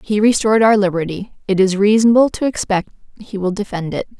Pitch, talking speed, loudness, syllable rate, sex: 205 Hz, 185 wpm, -16 LUFS, 6.1 syllables/s, female